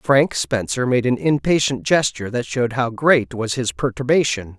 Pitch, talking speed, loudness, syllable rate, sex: 125 Hz, 170 wpm, -19 LUFS, 4.8 syllables/s, male